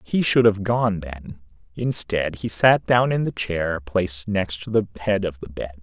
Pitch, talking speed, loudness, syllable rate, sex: 95 Hz, 205 wpm, -22 LUFS, 4.3 syllables/s, male